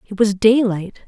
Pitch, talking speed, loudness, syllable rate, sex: 210 Hz, 170 wpm, -16 LUFS, 4.4 syllables/s, female